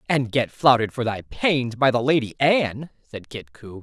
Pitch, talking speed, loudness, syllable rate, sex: 125 Hz, 205 wpm, -21 LUFS, 4.8 syllables/s, male